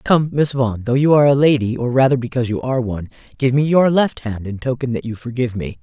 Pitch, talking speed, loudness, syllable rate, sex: 125 Hz, 255 wpm, -17 LUFS, 6.7 syllables/s, female